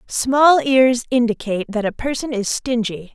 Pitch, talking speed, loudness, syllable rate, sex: 240 Hz, 155 wpm, -18 LUFS, 4.5 syllables/s, female